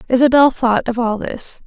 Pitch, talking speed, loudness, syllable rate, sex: 245 Hz, 180 wpm, -15 LUFS, 4.7 syllables/s, female